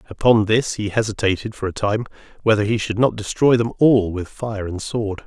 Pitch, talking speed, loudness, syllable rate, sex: 105 Hz, 205 wpm, -20 LUFS, 5.1 syllables/s, male